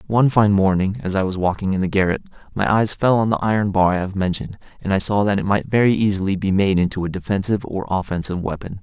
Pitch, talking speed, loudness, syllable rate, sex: 100 Hz, 245 wpm, -19 LUFS, 6.7 syllables/s, male